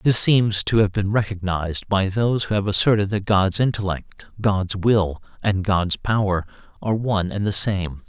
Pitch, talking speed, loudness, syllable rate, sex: 100 Hz, 180 wpm, -21 LUFS, 4.8 syllables/s, male